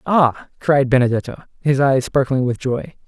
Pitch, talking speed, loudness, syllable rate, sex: 135 Hz, 155 wpm, -18 LUFS, 4.6 syllables/s, male